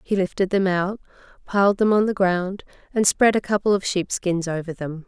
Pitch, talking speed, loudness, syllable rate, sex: 190 Hz, 200 wpm, -21 LUFS, 5.2 syllables/s, female